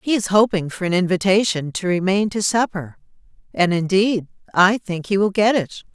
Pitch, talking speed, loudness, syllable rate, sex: 190 Hz, 180 wpm, -19 LUFS, 5.0 syllables/s, female